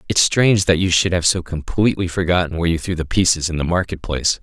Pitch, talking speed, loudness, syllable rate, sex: 85 Hz, 245 wpm, -18 LUFS, 6.6 syllables/s, male